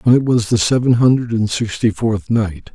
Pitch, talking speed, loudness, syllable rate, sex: 110 Hz, 220 wpm, -16 LUFS, 4.9 syllables/s, male